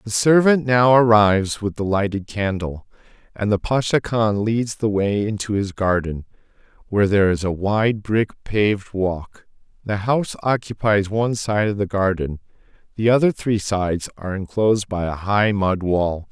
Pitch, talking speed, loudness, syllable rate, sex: 105 Hz, 165 wpm, -20 LUFS, 4.7 syllables/s, male